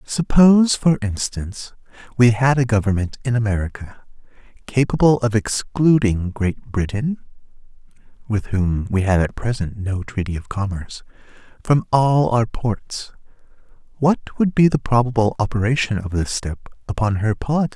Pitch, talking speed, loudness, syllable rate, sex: 115 Hz, 135 wpm, -19 LUFS, 4.0 syllables/s, male